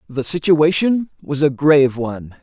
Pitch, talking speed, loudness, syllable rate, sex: 145 Hz, 150 wpm, -16 LUFS, 4.7 syllables/s, male